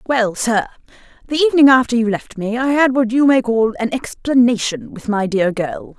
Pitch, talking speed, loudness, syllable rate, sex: 240 Hz, 200 wpm, -16 LUFS, 5.0 syllables/s, female